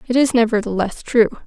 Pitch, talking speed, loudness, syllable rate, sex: 230 Hz, 165 wpm, -17 LUFS, 6.0 syllables/s, female